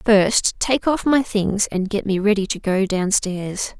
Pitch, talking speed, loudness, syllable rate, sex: 205 Hz, 205 wpm, -19 LUFS, 4.5 syllables/s, female